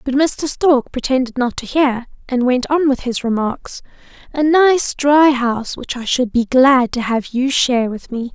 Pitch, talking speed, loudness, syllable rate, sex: 260 Hz, 195 wpm, -16 LUFS, 4.4 syllables/s, female